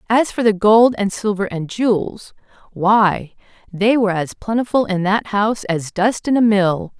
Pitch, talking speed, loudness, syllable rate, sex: 205 Hz, 170 wpm, -17 LUFS, 4.5 syllables/s, female